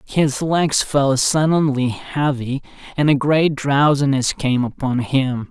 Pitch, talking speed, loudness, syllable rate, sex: 140 Hz, 130 wpm, -18 LUFS, 3.6 syllables/s, male